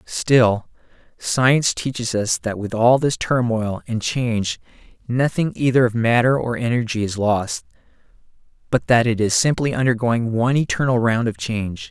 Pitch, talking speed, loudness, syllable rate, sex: 120 Hz, 150 wpm, -19 LUFS, 4.7 syllables/s, male